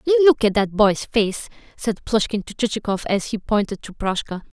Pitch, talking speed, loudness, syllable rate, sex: 220 Hz, 185 wpm, -21 LUFS, 5.2 syllables/s, female